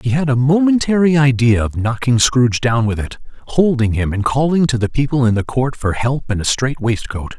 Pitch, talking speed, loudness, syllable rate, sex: 130 Hz, 220 wpm, -16 LUFS, 5.3 syllables/s, male